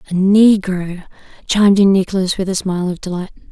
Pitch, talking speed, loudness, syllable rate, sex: 190 Hz, 170 wpm, -15 LUFS, 5.8 syllables/s, female